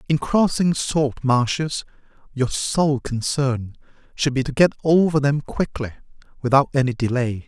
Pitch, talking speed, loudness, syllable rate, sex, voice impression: 135 Hz, 135 wpm, -21 LUFS, 4.3 syllables/s, male, masculine, adult-like, slightly middle-aged, slightly thick, slightly tensed, slightly powerful, slightly bright, hard, clear, fluent, slightly cool, intellectual, refreshing, very sincere, very calm, slightly mature, slightly friendly, reassuring, unique, elegant, slightly wild, slightly sweet, slightly lively, kind, slightly modest